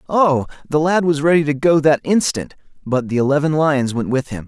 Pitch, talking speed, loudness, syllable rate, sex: 150 Hz, 215 wpm, -17 LUFS, 5.3 syllables/s, male